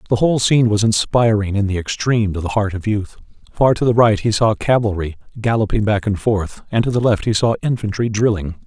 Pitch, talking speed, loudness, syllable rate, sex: 110 Hz, 220 wpm, -17 LUFS, 5.8 syllables/s, male